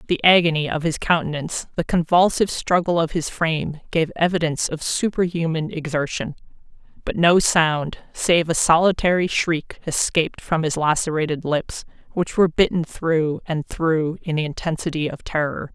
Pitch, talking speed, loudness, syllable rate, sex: 165 Hz, 150 wpm, -21 LUFS, 5.0 syllables/s, female